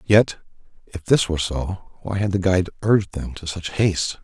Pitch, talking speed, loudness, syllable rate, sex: 90 Hz, 200 wpm, -21 LUFS, 5.2 syllables/s, male